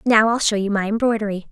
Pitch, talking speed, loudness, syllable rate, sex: 215 Hz, 235 wpm, -19 LUFS, 6.5 syllables/s, female